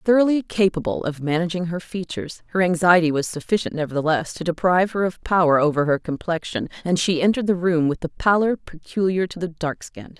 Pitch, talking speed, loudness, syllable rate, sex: 175 Hz, 190 wpm, -21 LUFS, 6.0 syllables/s, female